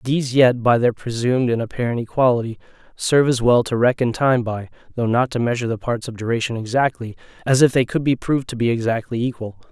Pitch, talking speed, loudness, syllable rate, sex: 120 Hz, 210 wpm, -19 LUFS, 4.9 syllables/s, male